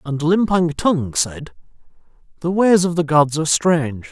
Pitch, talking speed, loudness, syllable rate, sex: 160 Hz, 160 wpm, -17 LUFS, 4.5 syllables/s, male